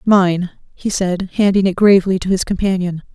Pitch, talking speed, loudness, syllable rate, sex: 190 Hz, 170 wpm, -16 LUFS, 5.3 syllables/s, female